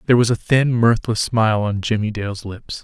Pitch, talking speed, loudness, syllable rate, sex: 110 Hz, 210 wpm, -18 LUFS, 5.6 syllables/s, male